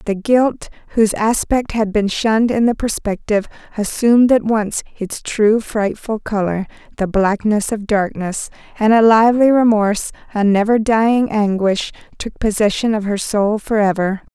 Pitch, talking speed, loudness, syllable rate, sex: 215 Hz, 145 wpm, -16 LUFS, 4.7 syllables/s, female